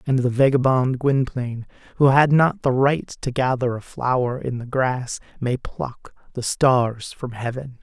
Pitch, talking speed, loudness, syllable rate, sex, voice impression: 130 Hz, 170 wpm, -21 LUFS, 4.2 syllables/s, male, masculine, adult-like, slightly weak, soft, slightly muffled, sincere, calm